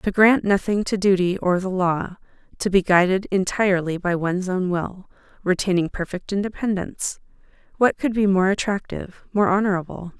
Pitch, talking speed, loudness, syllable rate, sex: 190 Hz, 145 wpm, -21 LUFS, 5.3 syllables/s, female